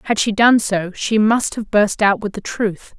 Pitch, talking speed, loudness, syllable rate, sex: 210 Hz, 240 wpm, -17 LUFS, 4.3 syllables/s, female